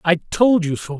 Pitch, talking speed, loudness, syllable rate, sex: 180 Hz, 240 wpm, -18 LUFS, 4.5 syllables/s, male